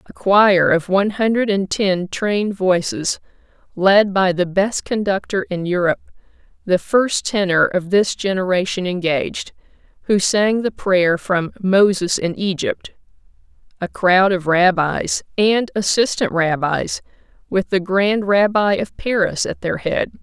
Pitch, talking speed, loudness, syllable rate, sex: 190 Hz, 135 wpm, -17 LUFS, 4.1 syllables/s, female